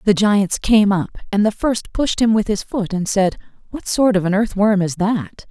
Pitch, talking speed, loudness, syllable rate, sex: 205 Hz, 230 wpm, -18 LUFS, 4.6 syllables/s, female